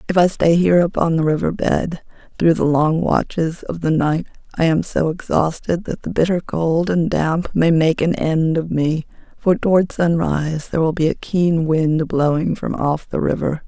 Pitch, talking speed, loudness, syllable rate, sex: 165 Hz, 195 wpm, -18 LUFS, 4.6 syllables/s, female